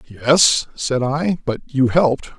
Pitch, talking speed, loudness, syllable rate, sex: 140 Hz, 150 wpm, -17 LUFS, 4.2 syllables/s, male